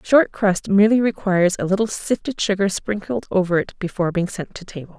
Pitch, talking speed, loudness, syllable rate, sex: 195 Hz, 195 wpm, -20 LUFS, 5.8 syllables/s, female